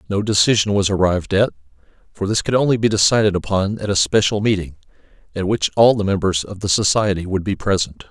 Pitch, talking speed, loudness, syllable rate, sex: 100 Hz, 200 wpm, -18 LUFS, 6.2 syllables/s, male